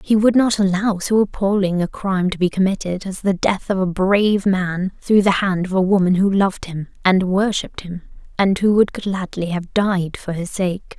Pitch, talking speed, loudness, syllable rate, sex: 190 Hz, 215 wpm, -18 LUFS, 4.9 syllables/s, female